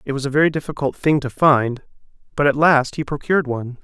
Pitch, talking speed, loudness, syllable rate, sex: 140 Hz, 220 wpm, -18 LUFS, 6.2 syllables/s, male